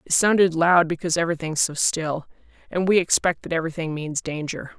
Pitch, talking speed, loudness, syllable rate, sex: 165 Hz, 175 wpm, -22 LUFS, 6.0 syllables/s, female